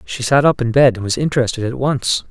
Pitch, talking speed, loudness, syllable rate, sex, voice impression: 125 Hz, 260 wpm, -16 LUFS, 5.9 syllables/s, male, very masculine, slightly middle-aged, slightly thick, slightly relaxed, slightly weak, slightly dark, slightly hard, slightly clear, fluent, slightly cool, intellectual, slightly refreshing, very sincere, calm, slightly mature, slightly friendly, slightly reassuring, unique, slightly wild, slightly sweet, slightly lively, kind, slightly sharp, modest